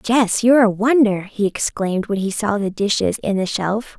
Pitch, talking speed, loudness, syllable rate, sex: 210 Hz, 210 wpm, -18 LUFS, 4.9 syllables/s, female